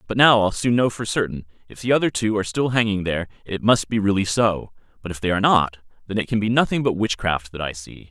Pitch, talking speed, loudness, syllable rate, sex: 105 Hz, 260 wpm, -21 LUFS, 6.3 syllables/s, male